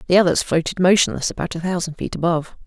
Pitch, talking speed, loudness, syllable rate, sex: 175 Hz, 205 wpm, -19 LUFS, 7.1 syllables/s, female